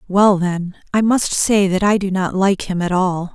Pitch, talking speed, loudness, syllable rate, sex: 190 Hz, 235 wpm, -17 LUFS, 4.3 syllables/s, female